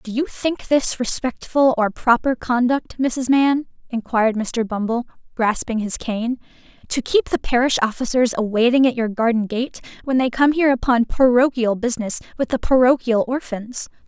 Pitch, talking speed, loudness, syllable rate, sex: 245 Hz, 160 wpm, -19 LUFS, 4.9 syllables/s, female